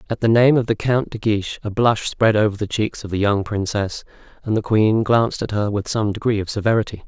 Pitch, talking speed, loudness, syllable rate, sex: 110 Hz, 245 wpm, -19 LUFS, 5.8 syllables/s, male